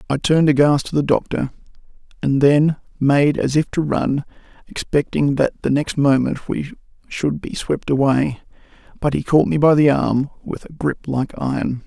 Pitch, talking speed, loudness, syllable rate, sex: 145 Hz, 175 wpm, -18 LUFS, 4.7 syllables/s, male